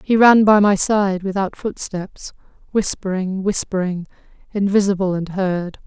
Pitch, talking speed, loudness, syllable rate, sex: 195 Hz, 110 wpm, -18 LUFS, 4.3 syllables/s, female